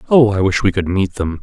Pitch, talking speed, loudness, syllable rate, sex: 100 Hz, 295 wpm, -16 LUFS, 5.7 syllables/s, male